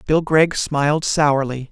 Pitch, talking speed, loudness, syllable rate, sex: 145 Hz, 140 wpm, -17 LUFS, 3.8 syllables/s, male